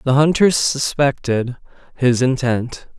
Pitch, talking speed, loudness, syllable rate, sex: 130 Hz, 100 wpm, -17 LUFS, 3.7 syllables/s, male